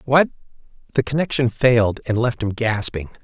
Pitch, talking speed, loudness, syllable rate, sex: 120 Hz, 150 wpm, -20 LUFS, 5.3 syllables/s, male